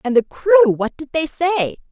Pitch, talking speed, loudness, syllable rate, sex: 270 Hz, 220 wpm, -17 LUFS, 4.7 syllables/s, female